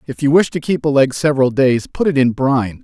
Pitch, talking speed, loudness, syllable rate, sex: 135 Hz, 275 wpm, -15 LUFS, 5.9 syllables/s, male